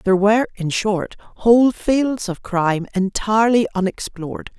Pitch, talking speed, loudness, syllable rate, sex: 205 Hz, 130 wpm, -18 LUFS, 5.0 syllables/s, female